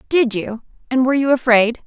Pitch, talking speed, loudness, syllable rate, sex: 245 Hz, 195 wpm, -16 LUFS, 5.6 syllables/s, female